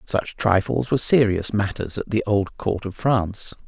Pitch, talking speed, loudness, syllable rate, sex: 105 Hz, 180 wpm, -22 LUFS, 4.7 syllables/s, male